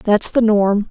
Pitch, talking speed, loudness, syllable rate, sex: 210 Hz, 200 wpm, -15 LUFS, 3.5 syllables/s, female